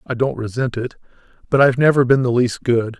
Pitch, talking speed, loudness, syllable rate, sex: 125 Hz, 220 wpm, -17 LUFS, 6.0 syllables/s, male